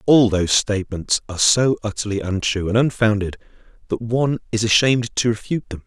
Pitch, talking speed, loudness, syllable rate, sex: 110 Hz, 165 wpm, -19 LUFS, 6.1 syllables/s, male